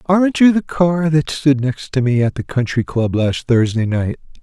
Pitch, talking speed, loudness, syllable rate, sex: 140 Hz, 215 wpm, -16 LUFS, 4.6 syllables/s, male